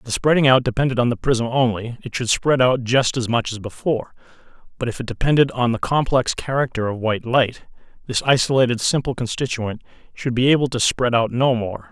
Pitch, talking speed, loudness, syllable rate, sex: 125 Hz, 205 wpm, -20 LUFS, 5.7 syllables/s, male